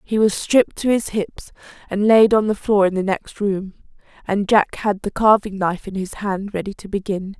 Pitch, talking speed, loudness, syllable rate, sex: 205 Hz, 220 wpm, -19 LUFS, 5.0 syllables/s, female